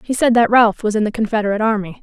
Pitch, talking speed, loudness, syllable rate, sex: 220 Hz, 265 wpm, -16 LUFS, 7.3 syllables/s, female